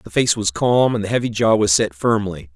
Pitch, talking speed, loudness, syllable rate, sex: 105 Hz, 260 wpm, -18 LUFS, 5.2 syllables/s, male